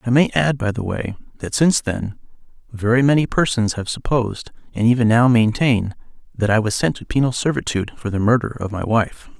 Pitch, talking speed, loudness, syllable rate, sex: 115 Hz, 200 wpm, -19 LUFS, 5.6 syllables/s, male